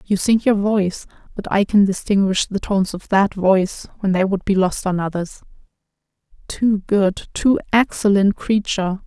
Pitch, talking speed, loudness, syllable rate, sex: 200 Hz, 165 wpm, -18 LUFS, 4.9 syllables/s, female